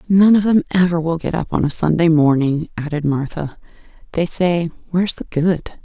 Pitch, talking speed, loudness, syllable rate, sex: 165 Hz, 185 wpm, -17 LUFS, 5.1 syllables/s, female